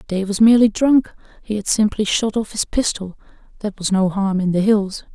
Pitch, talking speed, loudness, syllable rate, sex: 205 Hz, 200 wpm, -18 LUFS, 5.2 syllables/s, female